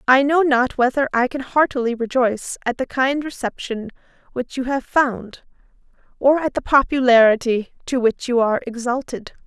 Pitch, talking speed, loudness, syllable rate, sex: 255 Hz, 160 wpm, -19 LUFS, 5.0 syllables/s, female